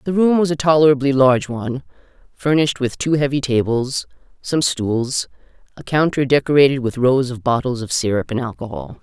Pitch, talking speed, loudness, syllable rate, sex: 135 Hz, 165 wpm, -18 LUFS, 5.5 syllables/s, female